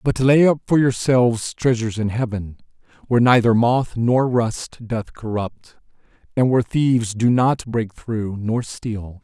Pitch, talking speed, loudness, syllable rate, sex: 120 Hz, 155 wpm, -19 LUFS, 4.3 syllables/s, male